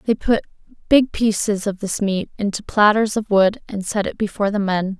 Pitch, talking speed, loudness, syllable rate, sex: 205 Hz, 205 wpm, -19 LUFS, 5.2 syllables/s, female